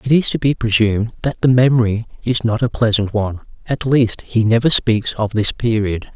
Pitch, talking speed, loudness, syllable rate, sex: 115 Hz, 205 wpm, -16 LUFS, 5.3 syllables/s, male